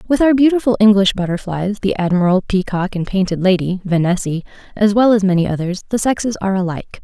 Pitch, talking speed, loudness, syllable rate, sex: 195 Hz, 180 wpm, -16 LUFS, 6.2 syllables/s, female